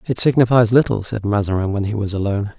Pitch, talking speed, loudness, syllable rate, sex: 110 Hz, 210 wpm, -18 LUFS, 6.6 syllables/s, male